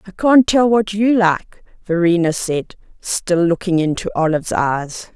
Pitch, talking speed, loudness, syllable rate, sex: 185 Hz, 150 wpm, -16 LUFS, 4.3 syllables/s, female